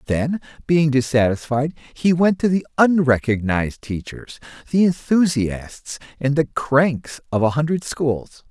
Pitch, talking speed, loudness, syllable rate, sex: 145 Hz, 125 wpm, -19 LUFS, 4.0 syllables/s, male